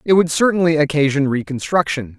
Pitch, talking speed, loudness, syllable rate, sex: 155 Hz, 135 wpm, -17 LUFS, 5.7 syllables/s, male